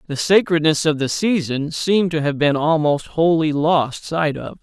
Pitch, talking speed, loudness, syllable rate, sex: 155 Hz, 180 wpm, -18 LUFS, 4.5 syllables/s, male